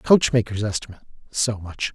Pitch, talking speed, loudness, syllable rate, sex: 110 Hz, 155 wpm, -23 LUFS, 5.7 syllables/s, male